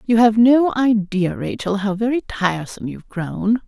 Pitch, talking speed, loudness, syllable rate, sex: 215 Hz, 165 wpm, -18 LUFS, 5.0 syllables/s, female